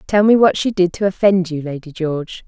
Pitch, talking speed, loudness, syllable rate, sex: 180 Hz, 240 wpm, -16 LUFS, 5.6 syllables/s, female